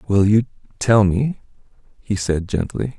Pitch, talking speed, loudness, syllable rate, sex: 105 Hz, 140 wpm, -19 LUFS, 3.4 syllables/s, male